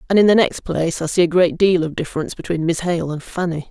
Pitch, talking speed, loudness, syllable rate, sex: 170 Hz, 275 wpm, -18 LUFS, 6.5 syllables/s, female